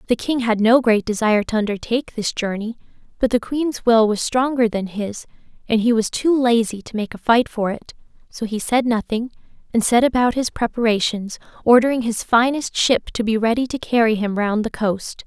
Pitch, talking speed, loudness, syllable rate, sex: 230 Hz, 200 wpm, -19 LUFS, 5.3 syllables/s, female